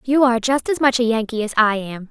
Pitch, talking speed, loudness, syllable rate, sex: 235 Hz, 285 wpm, -18 LUFS, 6.1 syllables/s, female